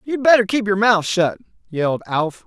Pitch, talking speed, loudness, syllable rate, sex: 195 Hz, 195 wpm, -18 LUFS, 5.0 syllables/s, male